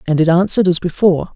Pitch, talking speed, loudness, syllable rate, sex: 170 Hz, 220 wpm, -14 LUFS, 7.8 syllables/s, male